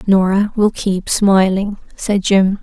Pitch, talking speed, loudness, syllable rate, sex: 195 Hz, 135 wpm, -15 LUFS, 3.5 syllables/s, female